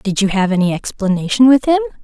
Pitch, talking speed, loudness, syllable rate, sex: 215 Hz, 205 wpm, -14 LUFS, 6.3 syllables/s, female